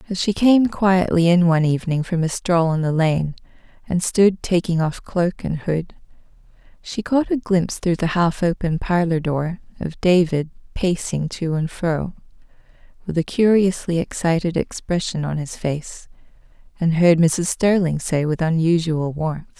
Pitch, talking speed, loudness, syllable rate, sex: 170 Hz, 160 wpm, -20 LUFS, 4.5 syllables/s, female